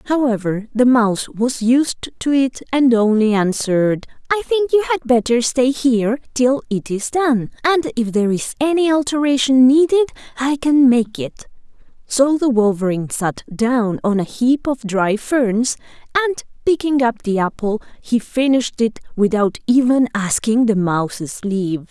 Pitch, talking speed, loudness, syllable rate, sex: 245 Hz, 155 wpm, -17 LUFS, 4.5 syllables/s, female